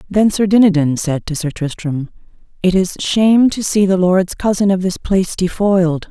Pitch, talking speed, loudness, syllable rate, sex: 185 Hz, 185 wpm, -15 LUFS, 5.0 syllables/s, female